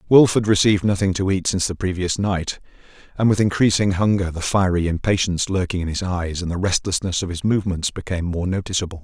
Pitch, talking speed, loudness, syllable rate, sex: 95 Hz, 200 wpm, -20 LUFS, 6.3 syllables/s, male